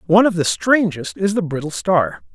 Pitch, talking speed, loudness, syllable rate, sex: 175 Hz, 205 wpm, -18 LUFS, 5.2 syllables/s, male